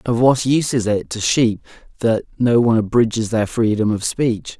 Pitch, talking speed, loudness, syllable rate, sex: 115 Hz, 195 wpm, -18 LUFS, 5.0 syllables/s, male